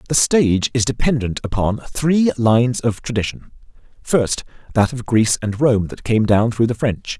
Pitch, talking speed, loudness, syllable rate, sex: 120 Hz, 175 wpm, -18 LUFS, 4.9 syllables/s, male